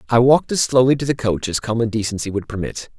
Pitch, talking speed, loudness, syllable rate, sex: 115 Hz, 240 wpm, -18 LUFS, 6.6 syllables/s, male